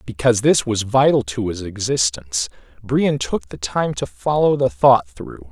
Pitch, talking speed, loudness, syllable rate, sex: 110 Hz, 175 wpm, -19 LUFS, 4.6 syllables/s, male